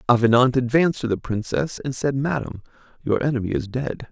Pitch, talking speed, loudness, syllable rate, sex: 125 Hz, 175 wpm, -22 LUFS, 5.7 syllables/s, male